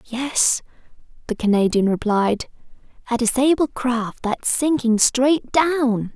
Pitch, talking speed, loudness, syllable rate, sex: 245 Hz, 105 wpm, -19 LUFS, 3.5 syllables/s, female